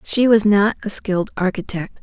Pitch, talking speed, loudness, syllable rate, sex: 205 Hz, 180 wpm, -18 LUFS, 5.1 syllables/s, female